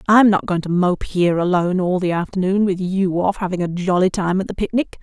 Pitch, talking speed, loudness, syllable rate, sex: 185 Hz, 240 wpm, -18 LUFS, 5.8 syllables/s, female